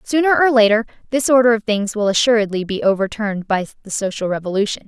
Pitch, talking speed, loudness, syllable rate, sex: 220 Hz, 185 wpm, -17 LUFS, 6.5 syllables/s, female